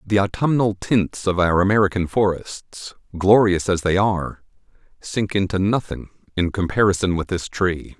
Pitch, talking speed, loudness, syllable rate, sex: 95 Hz, 145 wpm, -20 LUFS, 4.7 syllables/s, male